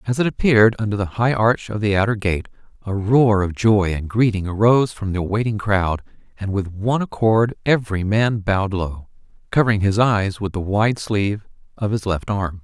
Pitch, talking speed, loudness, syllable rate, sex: 105 Hz, 195 wpm, -19 LUFS, 5.2 syllables/s, male